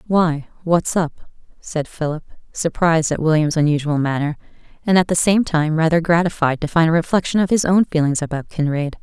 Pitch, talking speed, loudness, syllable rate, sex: 165 Hz, 180 wpm, -18 LUFS, 5.5 syllables/s, female